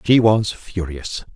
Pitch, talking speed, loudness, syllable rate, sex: 100 Hz, 135 wpm, -20 LUFS, 3.4 syllables/s, male